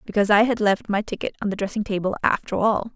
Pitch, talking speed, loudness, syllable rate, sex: 205 Hz, 245 wpm, -22 LUFS, 6.8 syllables/s, female